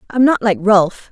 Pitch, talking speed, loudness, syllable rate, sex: 220 Hz, 215 wpm, -14 LUFS, 4.4 syllables/s, female